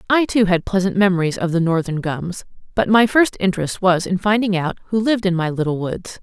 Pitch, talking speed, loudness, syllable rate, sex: 190 Hz, 220 wpm, -18 LUFS, 5.7 syllables/s, female